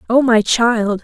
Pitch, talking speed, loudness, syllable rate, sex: 230 Hz, 175 wpm, -14 LUFS, 3.5 syllables/s, female